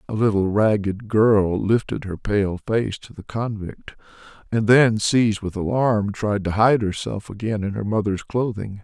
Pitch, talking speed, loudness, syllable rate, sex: 105 Hz, 170 wpm, -21 LUFS, 4.4 syllables/s, male